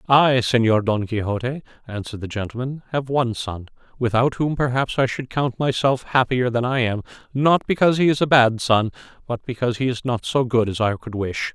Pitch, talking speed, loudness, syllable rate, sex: 125 Hz, 205 wpm, -21 LUFS, 5.5 syllables/s, male